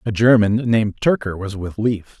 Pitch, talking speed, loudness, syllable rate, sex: 110 Hz, 190 wpm, -18 LUFS, 4.9 syllables/s, male